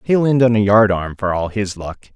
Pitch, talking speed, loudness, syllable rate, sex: 105 Hz, 250 wpm, -16 LUFS, 4.9 syllables/s, male